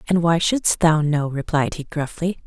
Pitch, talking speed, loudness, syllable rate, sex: 160 Hz, 195 wpm, -20 LUFS, 4.4 syllables/s, female